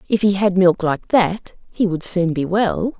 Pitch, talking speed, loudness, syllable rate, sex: 190 Hz, 220 wpm, -18 LUFS, 4.2 syllables/s, female